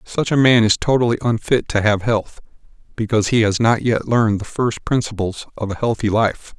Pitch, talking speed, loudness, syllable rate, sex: 110 Hz, 200 wpm, -18 LUFS, 5.4 syllables/s, male